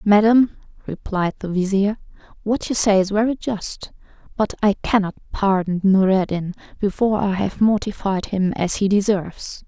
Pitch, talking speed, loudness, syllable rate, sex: 200 Hz, 145 wpm, -20 LUFS, 4.8 syllables/s, female